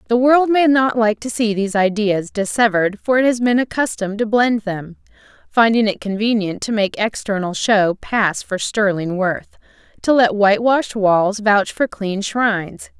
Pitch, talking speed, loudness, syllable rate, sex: 215 Hz, 170 wpm, -17 LUFS, 4.6 syllables/s, female